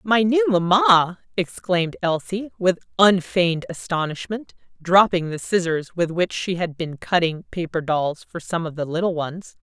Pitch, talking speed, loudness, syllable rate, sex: 180 Hz, 155 wpm, -21 LUFS, 4.5 syllables/s, female